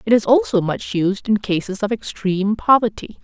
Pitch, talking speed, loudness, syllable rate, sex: 210 Hz, 185 wpm, -18 LUFS, 5.2 syllables/s, female